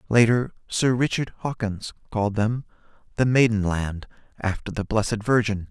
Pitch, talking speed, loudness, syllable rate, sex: 110 Hz, 125 wpm, -24 LUFS, 4.9 syllables/s, male